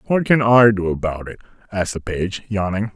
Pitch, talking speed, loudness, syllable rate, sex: 100 Hz, 205 wpm, -18 LUFS, 5.5 syllables/s, male